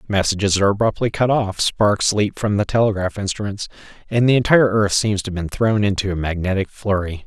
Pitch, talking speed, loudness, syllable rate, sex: 100 Hz, 200 wpm, -19 LUFS, 5.8 syllables/s, male